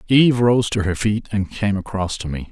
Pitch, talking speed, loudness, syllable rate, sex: 105 Hz, 240 wpm, -19 LUFS, 5.2 syllables/s, male